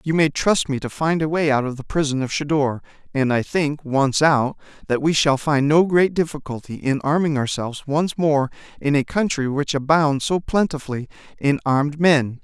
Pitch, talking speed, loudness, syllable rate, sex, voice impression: 145 Hz, 200 wpm, -20 LUFS, 5.0 syllables/s, male, masculine, slightly young, slightly adult-like, thick, tensed, slightly powerful, bright, slightly hard, clear, slightly fluent, cool, slightly intellectual, refreshing, sincere, very calm, slightly mature, slightly friendly, reassuring, wild, slightly sweet, very lively, kind